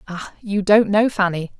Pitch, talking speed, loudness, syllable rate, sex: 195 Hz, 190 wpm, -18 LUFS, 4.4 syllables/s, female